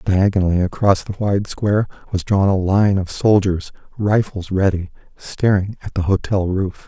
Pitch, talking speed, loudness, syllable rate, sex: 95 Hz, 155 wpm, -18 LUFS, 4.7 syllables/s, male